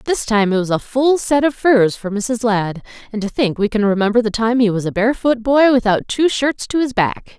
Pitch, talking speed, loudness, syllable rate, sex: 230 Hz, 250 wpm, -16 LUFS, 5.2 syllables/s, female